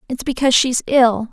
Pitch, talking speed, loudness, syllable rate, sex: 250 Hz, 225 wpm, -16 LUFS, 6.4 syllables/s, female